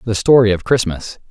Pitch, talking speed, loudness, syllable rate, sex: 110 Hz, 185 wpm, -14 LUFS, 5.4 syllables/s, male